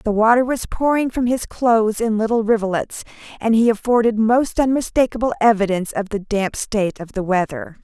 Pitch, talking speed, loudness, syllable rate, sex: 220 Hz, 175 wpm, -18 LUFS, 5.5 syllables/s, female